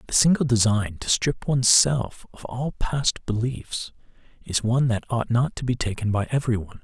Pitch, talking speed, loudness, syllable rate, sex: 120 Hz, 195 wpm, -23 LUFS, 5.2 syllables/s, male